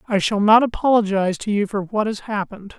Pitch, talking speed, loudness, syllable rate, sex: 205 Hz, 215 wpm, -19 LUFS, 6.0 syllables/s, male